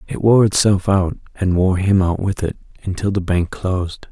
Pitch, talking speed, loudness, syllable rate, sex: 95 Hz, 205 wpm, -18 LUFS, 4.9 syllables/s, male